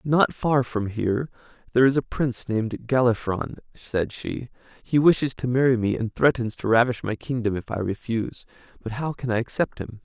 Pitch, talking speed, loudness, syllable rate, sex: 120 Hz, 190 wpm, -24 LUFS, 5.4 syllables/s, male